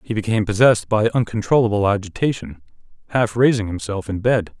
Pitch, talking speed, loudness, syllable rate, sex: 110 Hz, 130 wpm, -19 LUFS, 6.2 syllables/s, male